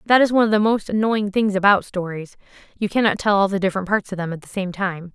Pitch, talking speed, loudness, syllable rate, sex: 200 Hz, 270 wpm, -20 LUFS, 6.6 syllables/s, female